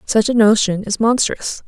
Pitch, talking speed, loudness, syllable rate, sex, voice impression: 215 Hz, 180 wpm, -16 LUFS, 4.5 syllables/s, female, feminine, slightly young, adult-like, thin, slightly tensed, slightly weak, bright, slightly soft, clear, fluent, slightly cute, very intellectual, refreshing, sincere, calm, friendly, very reassuring, elegant, slightly sweet, very kind, slightly modest